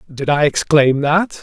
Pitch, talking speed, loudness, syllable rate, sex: 150 Hz, 170 wpm, -15 LUFS, 4.0 syllables/s, male